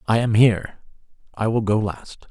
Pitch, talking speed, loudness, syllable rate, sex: 110 Hz, 180 wpm, -20 LUFS, 5.2 syllables/s, male